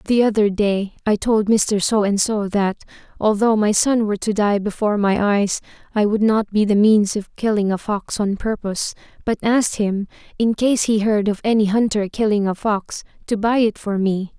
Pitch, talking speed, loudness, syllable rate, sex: 210 Hz, 205 wpm, -19 LUFS, 4.9 syllables/s, female